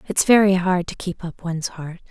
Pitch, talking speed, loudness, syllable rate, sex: 180 Hz, 230 wpm, -20 LUFS, 5.2 syllables/s, female